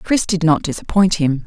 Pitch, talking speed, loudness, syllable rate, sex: 175 Hz, 205 wpm, -17 LUFS, 4.9 syllables/s, female